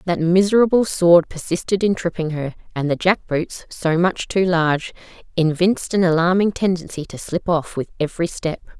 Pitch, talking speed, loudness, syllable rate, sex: 175 Hz, 170 wpm, -19 LUFS, 5.2 syllables/s, female